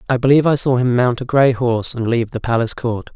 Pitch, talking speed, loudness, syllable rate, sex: 125 Hz, 265 wpm, -17 LUFS, 6.8 syllables/s, male